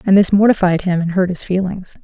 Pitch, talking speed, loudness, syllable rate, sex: 185 Hz, 235 wpm, -15 LUFS, 5.7 syllables/s, female